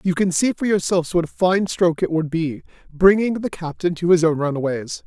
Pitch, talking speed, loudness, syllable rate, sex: 175 Hz, 225 wpm, -19 LUFS, 5.6 syllables/s, male